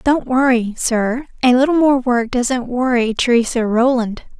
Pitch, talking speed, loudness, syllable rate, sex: 245 Hz, 150 wpm, -16 LUFS, 4.4 syllables/s, female